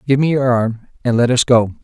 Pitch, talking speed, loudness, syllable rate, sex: 125 Hz, 260 wpm, -15 LUFS, 5.4 syllables/s, male